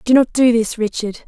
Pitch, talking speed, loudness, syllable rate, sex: 235 Hz, 235 wpm, -16 LUFS, 5.2 syllables/s, female